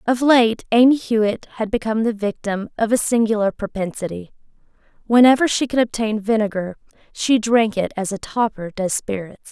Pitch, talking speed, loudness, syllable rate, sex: 220 Hz, 160 wpm, -19 LUFS, 5.3 syllables/s, female